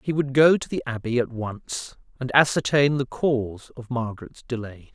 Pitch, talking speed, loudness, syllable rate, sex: 125 Hz, 180 wpm, -23 LUFS, 4.9 syllables/s, male